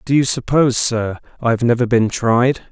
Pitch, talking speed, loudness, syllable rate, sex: 120 Hz, 175 wpm, -16 LUFS, 5.0 syllables/s, male